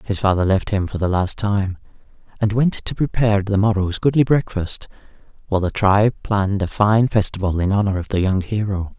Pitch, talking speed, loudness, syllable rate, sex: 100 Hz, 195 wpm, -19 LUFS, 5.6 syllables/s, male